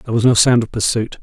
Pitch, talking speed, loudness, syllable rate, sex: 110 Hz, 295 wpm, -15 LUFS, 6.8 syllables/s, male